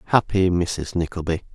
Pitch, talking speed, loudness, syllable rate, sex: 90 Hz, 115 wpm, -22 LUFS, 5.0 syllables/s, male